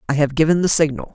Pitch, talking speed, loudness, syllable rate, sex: 150 Hz, 260 wpm, -17 LUFS, 7.2 syllables/s, female